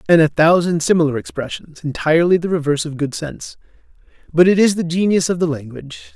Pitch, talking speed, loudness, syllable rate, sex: 165 Hz, 185 wpm, -17 LUFS, 6.4 syllables/s, male